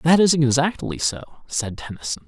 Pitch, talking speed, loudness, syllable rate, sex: 140 Hz, 160 wpm, -21 LUFS, 4.7 syllables/s, male